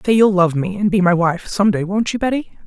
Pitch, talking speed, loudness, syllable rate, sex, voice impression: 205 Hz, 245 wpm, -17 LUFS, 5.7 syllables/s, female, feminine, adult-like, relaxed, slightly weak, soft, raspy, intellectual, slightly calm, friendly, elegant, slightly kind, slightly modest